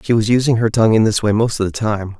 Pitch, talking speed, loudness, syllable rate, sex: 110 Hz, 330 wpm, -16 LUFS, 6.7 syllables/s, male